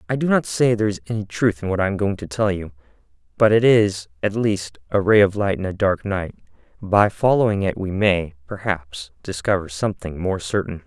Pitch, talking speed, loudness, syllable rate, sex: 100 Hz, 215 wpm, -20 LUFS, 5.4 syllables/s, male